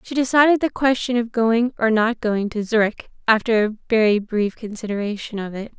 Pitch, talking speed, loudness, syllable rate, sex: 225 Hz, 185 wpm, -20 LUFS, 5.3 syllables/s, female